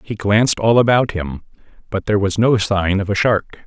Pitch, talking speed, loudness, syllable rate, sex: 105 Hz, 215 wpm, -17 LUFS, 5.4 syllables/s, male